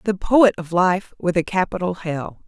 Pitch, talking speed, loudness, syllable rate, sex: 185 Hz, 195 wpm, -20 LUFS, 4.6 syllables/s, female